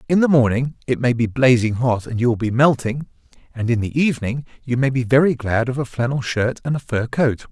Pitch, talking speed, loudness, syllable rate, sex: 125 Hz, 240 wpm, -19 LUFS, 5.7 syllables/s, male